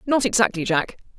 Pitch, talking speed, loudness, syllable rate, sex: 205 Hz, 150 wpm, -21 LUFS, 5.8 syllables/s, female